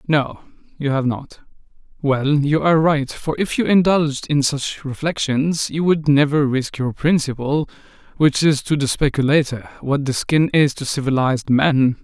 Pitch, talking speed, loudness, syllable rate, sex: 145 Hz, 160 wpm, -18 LUFS, 4.6 syllables/s, male